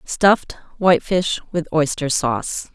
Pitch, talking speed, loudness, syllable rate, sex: 165 Hz, 110 wpm, -19 LUFS, 4.5 syllables/s, female